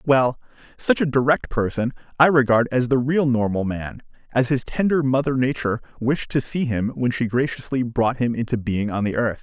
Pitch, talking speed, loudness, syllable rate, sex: 125 Hz, 195 wpm, -21 LUFS, 5.2 syllables/s, male